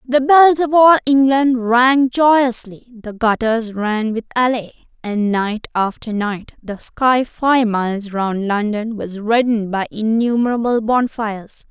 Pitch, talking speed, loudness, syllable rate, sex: 235 Hz, 140 wpm, -16 LUFS, 3.9 syllables/s, female